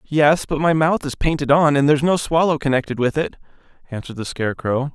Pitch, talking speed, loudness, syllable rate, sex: 145 Hz, 205 wpm, -19 LUFS, 6.1 syllables/s, male